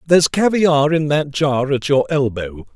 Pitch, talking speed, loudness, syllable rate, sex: 145 Hz, 175 wpm, -16 LUFS, 4.9 syllables/s, male